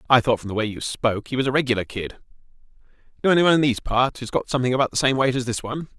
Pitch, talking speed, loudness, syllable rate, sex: 125 Hz, 280 wpm, -22 LUFS, 8.1 syllables/s, male